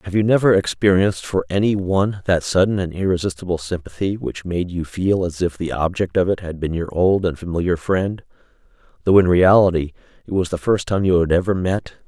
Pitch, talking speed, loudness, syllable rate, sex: 90 Hz, 205 wpm, -19 LUFS, 5.6 syllables/s, male